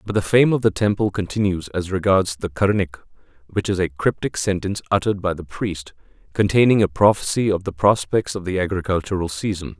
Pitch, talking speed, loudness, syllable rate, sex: 95 Hz, 185 wpm, -20 LUFS, 6.1 syllables/s, male